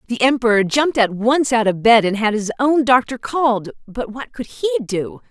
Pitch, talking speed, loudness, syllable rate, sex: 240 Hz, 215 wpm, -17 LUFS, 5.1 syllables/s, female